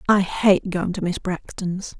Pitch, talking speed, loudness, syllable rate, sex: 185 Hz, 180 wpm, -22 LUFS, 3.9 syllables/s, female